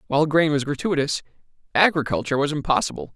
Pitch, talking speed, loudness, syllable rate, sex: 150 Hz, 135 wpm, -22 LUFS, 6.9 syllables/s, male